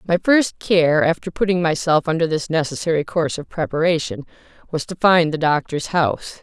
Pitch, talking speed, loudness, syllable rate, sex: 165 Hz, 170 wpm, -19 LUFS, 5.4 syllables/s, female